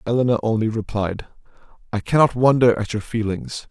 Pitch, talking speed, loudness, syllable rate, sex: 115 Hz, 145 wpm, -20 LUFS, 5.4 syllables/s, male